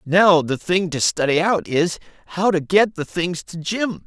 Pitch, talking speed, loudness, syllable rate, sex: 175 Hz, 205 wpm, -19 LUFS, 4.2 syllables/s, male